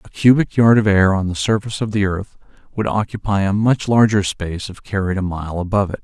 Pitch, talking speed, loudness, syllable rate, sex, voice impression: 100 Hz, 230 wpm, -17 LUFS, 5.9 syllables/s, male, masculine, middle-aged, relaxed, weak, slightly dark, slightly halting, calm, kind, modest